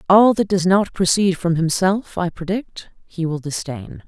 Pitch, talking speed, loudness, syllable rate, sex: 180 Hz, 175 wpm, -19 LUFS, 4.3 syllables/s, female